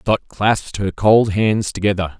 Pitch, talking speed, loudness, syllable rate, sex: 100 Hz, 165 wpm, -17 LUFS, 4.3 syllables/s, male